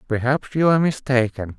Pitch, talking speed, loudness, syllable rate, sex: 130 Hz, 150 wpm, -20 LUFS, 5.6 syllables/s, male